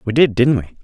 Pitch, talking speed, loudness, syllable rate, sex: 125 Hz, 285 wpm, -15 LUFS, 5.7 syllables/s, male